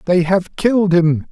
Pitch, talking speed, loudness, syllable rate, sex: 180 Hz, 185 wpm, -15 LUFS, 4.4 syllables/s, male